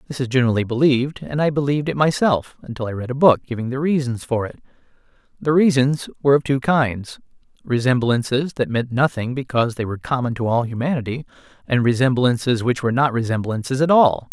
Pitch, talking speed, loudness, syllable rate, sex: 130 Hz, 185 wpm, -19 LUFS, 6.2 syllables/s, male